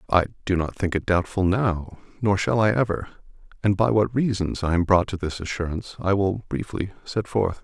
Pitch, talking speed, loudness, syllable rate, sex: 95 Hz, 205 wpm, -24 LUFS, 5.2 syllables/s, male